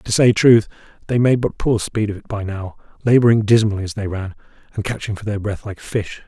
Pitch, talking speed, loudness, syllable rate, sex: 105 Hz, 230 wpm, -18 LUFS, 5.7 syllables/s, male